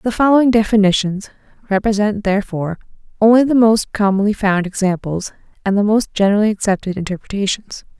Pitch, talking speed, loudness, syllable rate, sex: 205 Hz, 130 wpm, -16 LUFS, 6.1 syllables/s, female